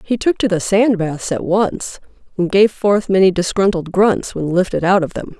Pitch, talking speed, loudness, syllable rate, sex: 190 Hz, 210 wpm, -16 LUFS, 4.7 syllables/s, female